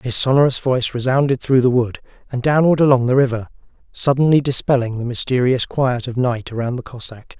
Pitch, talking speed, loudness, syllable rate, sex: 125 Hz, 180 wpm, -17 LUFS, 5.8 syllables/s, male